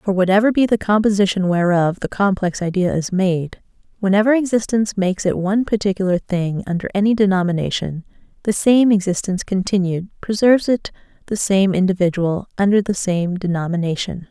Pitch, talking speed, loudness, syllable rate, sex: 195 Hz, 145 wpm, -18 LUFS, 5.7 syllables/s, female